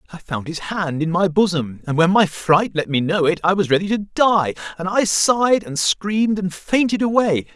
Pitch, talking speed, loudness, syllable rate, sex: 185 Hz, 220 wpm, -18 LUFS, 4.9 syllables/s, male